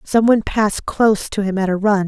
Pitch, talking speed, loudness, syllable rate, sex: 205 Hz, 260 wpm, -17 LUFS, 5.9 syllables/s, female